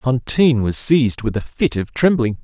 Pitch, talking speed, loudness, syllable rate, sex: 130 Hz, 195 wpm, -17 LUFS, 5.0 syllables/s, male